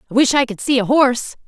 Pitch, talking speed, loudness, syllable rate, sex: 250 Hz, 285 wpm, -16 LUFS, 6.9 syllables/s, female